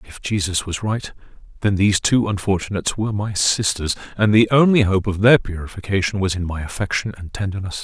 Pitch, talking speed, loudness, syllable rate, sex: 100 Hz, 185 wpm, -19 LUFS, 5.9 syllables/s, male